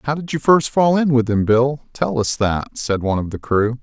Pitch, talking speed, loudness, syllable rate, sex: 125 Hz, 250 wpm, -18 LUFS, 5.1 syllables/s, male